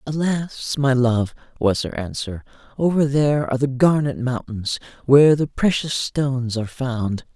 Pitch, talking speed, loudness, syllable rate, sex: 130 Hz, 145 wpm, -20 LUFS, 4.6 syllables/s, male